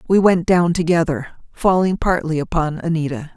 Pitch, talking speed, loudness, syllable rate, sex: 165 Hz, 145 wpm, -18 LUFS, 5.2 syllables/s, female